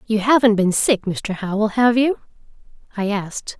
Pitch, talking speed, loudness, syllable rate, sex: 215 Hz, 165 wpm, -18 LUFS, 4.9 syllables/s, female